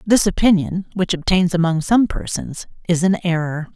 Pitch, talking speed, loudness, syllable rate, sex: 180 Hz, 160 wpm, -18 LUFS, 4.9 syllables/s, female